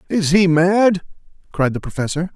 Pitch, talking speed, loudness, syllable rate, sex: 175 Hz, 155 wpm, -17 LUFS, 4.9 syllables/s, male